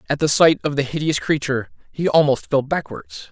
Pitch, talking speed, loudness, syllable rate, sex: 145 Hz, 200 wpm, -19 LUFS, 5.5 syllables/s, male